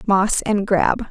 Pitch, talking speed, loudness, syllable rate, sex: 200 Hz, 165 wpm, -18 LUFS, 3.2 syllables/s, female